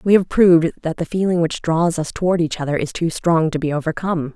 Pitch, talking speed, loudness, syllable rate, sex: 165 Hz, 250 wpm, -18 LUFS, 6.1 syllables/s, female